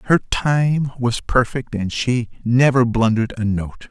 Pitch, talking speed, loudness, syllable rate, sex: 120 Hz, 155 wpm, -19 LUFS, 3.8 syllables/s, male